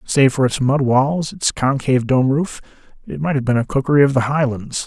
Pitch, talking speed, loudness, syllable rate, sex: 135 Hz, 220 wpm, -17 LUFS, 5.3 syllables/s, male